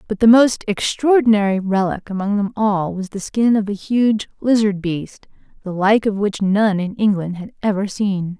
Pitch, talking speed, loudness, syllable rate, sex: 205 Hz, 185 wpm, -18 LUFS, 4.6 syllables/s, female